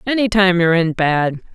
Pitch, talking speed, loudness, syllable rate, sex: 185 Hz, 195 wpm, -15 LUFS, 5.6 syllables/s, female